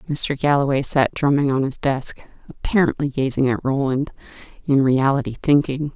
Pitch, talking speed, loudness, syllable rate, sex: 140 Hz, 140 wpm, -20 LUFS, 5.1 syllables/s, female